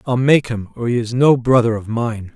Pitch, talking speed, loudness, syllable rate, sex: 120 Hz, 255 wpm, -17 LUFS, 5.1 syllables/s, male